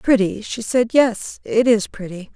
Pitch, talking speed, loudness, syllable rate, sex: 220 Hz, 180 wpm, -18 LUFS, 4.0 syllables/s, female